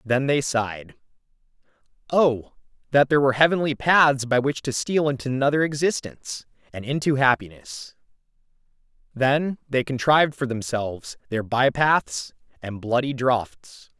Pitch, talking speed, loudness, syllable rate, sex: 130 Hz, 130 wpm, -22 LUFS, 4.7 syllables/s, male